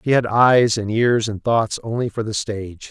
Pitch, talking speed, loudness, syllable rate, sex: 110 Hz, 225 wpm, -19 LUFS, 4.7 syllables/s, male